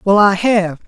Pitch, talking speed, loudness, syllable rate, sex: 195 Hz, 205 wpm, -13 LUFS, 4.1 syllables/s, male